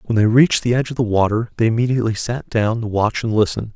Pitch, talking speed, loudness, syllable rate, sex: 115 Hz, 255 wpm, -18 LUFS, 6.8 syllables/s, male